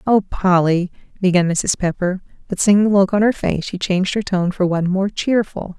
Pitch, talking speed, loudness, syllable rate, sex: 190 Hz, 210 wpm, -17 LUFS, 5.1 syllables/s, female